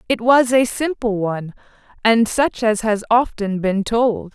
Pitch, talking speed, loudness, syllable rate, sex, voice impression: 225 Hz, 165 wpm, -18 LUFS, 4.2 syllables/s, female, feminine, middle-aged, slightly relaxed, slightly powerful, soft, clear, slightly halting, intellectual, friendly, reassuring, slightly elegant, lively, modest